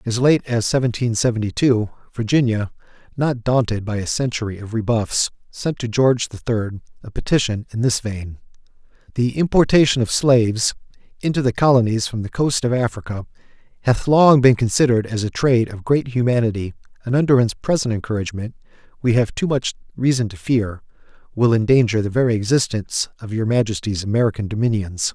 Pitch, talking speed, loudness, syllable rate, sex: 115 Hz, 160 wpm, -19 LUFS, 5.8 syllables/s, male